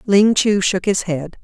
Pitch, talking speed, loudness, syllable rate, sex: 195 Hz, 210 wpm, -16 LUFS, 3.9 syllables/s, female